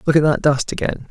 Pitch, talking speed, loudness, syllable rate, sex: 145 Hz, 270 wpm, -18 LUFS, 6.2 syllables/s, male